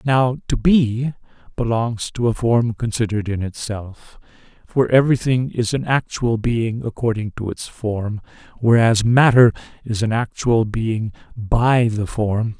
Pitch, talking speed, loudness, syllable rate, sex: 115 Hz, 140 wpm, -19 LUFS, 4.1 syllables/s, male